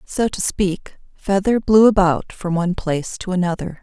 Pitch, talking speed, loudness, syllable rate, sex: 185 Hz, 170 wpm, -18 LUFS, 4.8 syllables/s, female